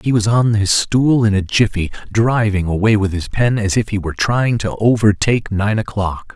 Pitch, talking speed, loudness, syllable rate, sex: 105 Hz, 210 wpm, -16 LUFS, 5.0 syllables/s, male